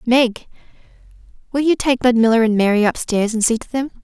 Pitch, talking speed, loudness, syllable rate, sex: 240 Hz, 180 wpm, -17 LUFS, 5.7 syllables/s, female